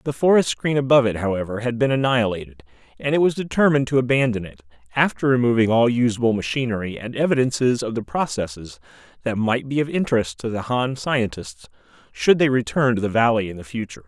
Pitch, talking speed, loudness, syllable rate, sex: 120 Hz, 190 wpm, -21 LUFS, 6.3 syllables/s, male